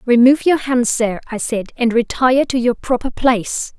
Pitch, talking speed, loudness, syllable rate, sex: 245 Hz, 190 wpm, -16 LUFS, 5.2 syllables/s, female